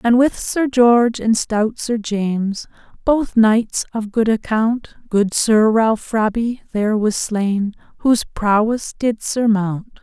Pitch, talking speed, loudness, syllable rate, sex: 220 Hz, 145 wpm, -17 LUFS, 3.9 syllables/s, female